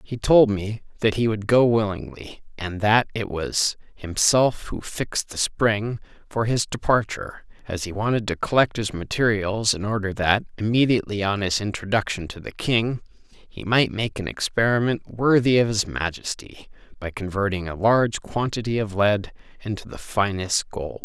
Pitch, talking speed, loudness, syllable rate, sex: 105 Hz, 165 wpm, -23 LUFS, 4.7 syllables/s, male